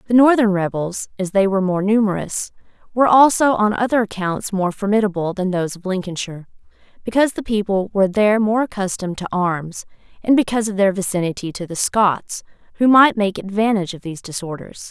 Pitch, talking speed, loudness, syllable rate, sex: 200 Hz, 175 wpm, -18 LUFS, 6.1 syllables/s, female